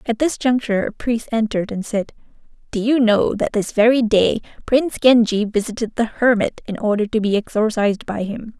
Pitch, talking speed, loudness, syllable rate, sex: 220 Hz, 190 wpm, -19 LUFS, 5.5 syllables/s, female